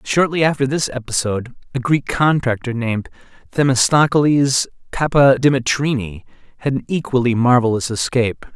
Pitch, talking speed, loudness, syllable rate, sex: 130 Hz, 105 wpm, -17 LUFS, 5.6 syllables/s, male